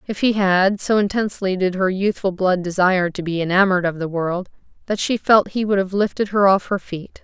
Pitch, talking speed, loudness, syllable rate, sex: 190 Hz, 225 wpm, -19 LUFS, 5.5 syllables/s, female